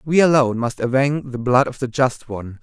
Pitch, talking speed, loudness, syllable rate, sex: 130 Hz, 230 wpm, -18 LUFS, 5.9 syllables/s, male